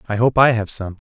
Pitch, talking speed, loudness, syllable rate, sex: 110 Hz, 280 wpm, -17 LUFS, 6.2 syllables/s, male